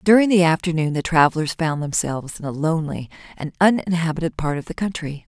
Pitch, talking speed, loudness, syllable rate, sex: 165 Hz, 180 wpm, -20 LUFS, 6.2 syllables/s, female